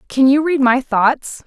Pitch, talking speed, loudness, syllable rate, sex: 265 Hz, 205 wpm, -14 LUFS, 3.9 syllables/s, female